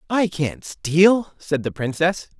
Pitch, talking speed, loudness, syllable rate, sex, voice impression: 170 Hz, 150 wpm, -20 LUFS, 3.3 syllables/s, male, masculine, adult-like, tensed, powerful, slightly muffled, raspy, friendly, unique, wild, lively, intense, slightly sharp